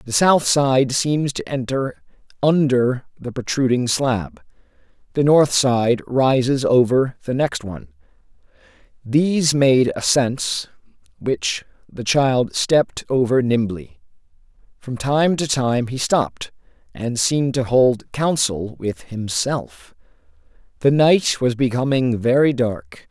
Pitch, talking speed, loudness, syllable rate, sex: 125 Hz, 120 wpm, -19 LUFS, 3.7 syllables/s, male